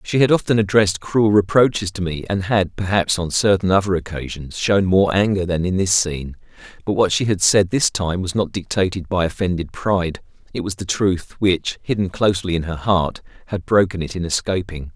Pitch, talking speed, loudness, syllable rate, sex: 95 Hz, 200 wpm, -19 LUFS, 5.3 syllables/s, male